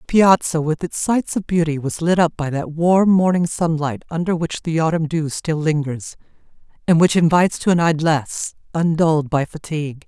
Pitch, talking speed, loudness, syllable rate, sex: 160 Hz, 185 wpm, -18 LUFS, 5.1 syllables/s, female